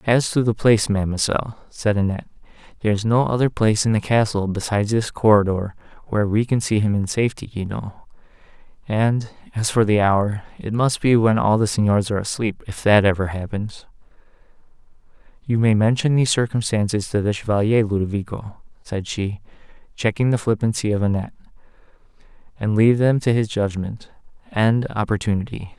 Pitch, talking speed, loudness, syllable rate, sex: 110 Hz, 160 wpm, -20 LUFS, 5.7 syllables/s, male